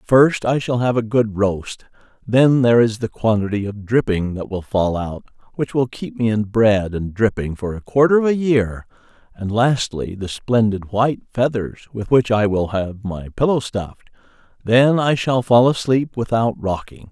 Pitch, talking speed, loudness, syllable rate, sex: 115 Hz, 185 wpm, -18 LUFS, 4.6 syllables/s, male